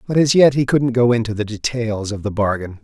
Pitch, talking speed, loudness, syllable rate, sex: 115 Hz, 255 wpm, -17 LUFS, 5.6 syllables/s, male